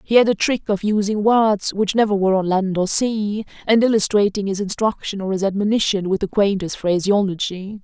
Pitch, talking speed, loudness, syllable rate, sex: 205 Hz, 190 wpm, -19 LUFS, 5.3 syllables/s, female